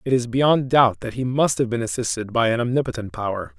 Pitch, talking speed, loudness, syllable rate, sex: 120 Hz, 235 wpm, -21 LUFS, 5.8 syllables/s, male